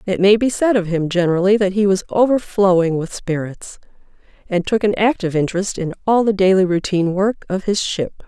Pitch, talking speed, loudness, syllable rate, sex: 190 Hz, 195 wpm, -17 LUFS, 5.7 syllables/s, female